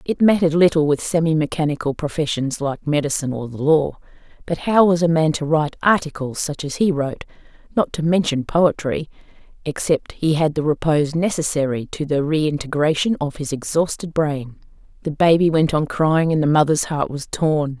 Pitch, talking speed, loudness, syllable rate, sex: 155 Hz, 175 wpm, -19 LUFS, 5.4 syllables/s, female